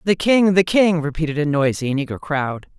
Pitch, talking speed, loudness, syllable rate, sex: 160 Hz, 215 wpm, -18 LUFS, 5.3 syllables/s, female